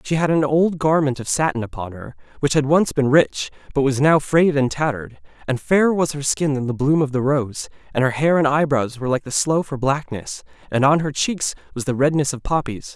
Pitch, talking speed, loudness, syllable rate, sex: 140 Hz, 235 wpm, -19 LUFS, 5.5 syllables/s, male